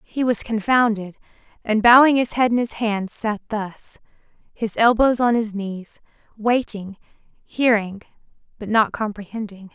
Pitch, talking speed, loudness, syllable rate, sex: 220 Hz, 125 wpm, -20 LUFS, 4.2 syllables/s, female